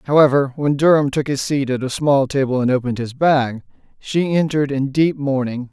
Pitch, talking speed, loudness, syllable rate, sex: 140 Hz, 200 wpm, -18 LUFS, 5.3 syllables/s, male